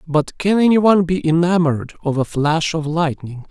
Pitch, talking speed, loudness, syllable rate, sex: 160 Hz, 190 wpm, -17 LUFS, 5.2 syllables/s, male